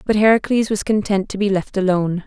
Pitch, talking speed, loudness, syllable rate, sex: 200 Hz, 210 wpm, -18 LUFS, 6.0 syllables/s, female